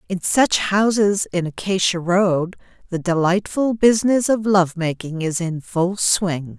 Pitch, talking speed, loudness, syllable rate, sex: 185 Hz, 145 wpm, -19 LUFS, 4.0 syllables/s, female